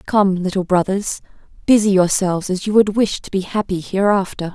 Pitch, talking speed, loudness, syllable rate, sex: 195 Hz, 170 wpm, -17 LUFS, 5.3 syllables/s, female